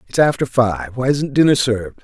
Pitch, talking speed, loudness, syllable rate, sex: 125 Hz, 205 wpm, -17 LUFS, 5.4 syllables/s, male